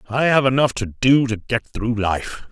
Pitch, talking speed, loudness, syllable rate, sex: 120 Hz, 215 wpm, -19 LUFS, 4.4 syllables/s, male